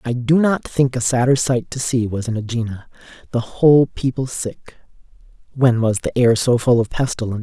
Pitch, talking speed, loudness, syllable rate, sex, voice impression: 125 Hz, 195 wpm, -18 LUFS, 5.2 syllables/s, male, masculine, adult-like, slightly thick, refreshing, sincere